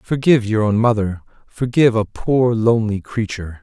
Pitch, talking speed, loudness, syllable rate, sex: 110 Hz, 135 wpm, -17 LUFS, 5.4 syllables/s, male